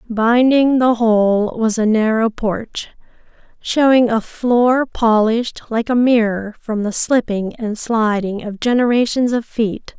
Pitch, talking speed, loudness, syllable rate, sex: 230 Hz, 140 wpm, -16 LUFS, 3.9 syllables/s, female